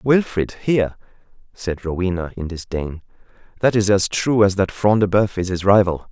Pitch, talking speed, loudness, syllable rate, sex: 100 Hz, 175 wpm, -19 LUFS, 5.0 syllables/s, male